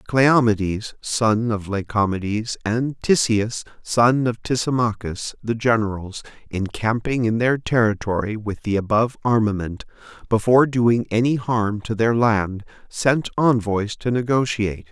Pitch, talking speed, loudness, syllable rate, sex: 110 Hz, 120 wpm, -20 LUFS, 4.4 syllables/s, male